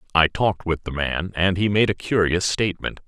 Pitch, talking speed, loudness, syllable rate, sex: 90 Hz, 215 wpm, -21 LUFS, 5.6 syllables/s, male